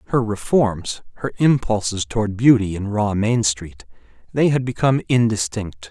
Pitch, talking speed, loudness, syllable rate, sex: 110 Hz, 140 wpm, -19 LUFS, 4.7 syllables/s, male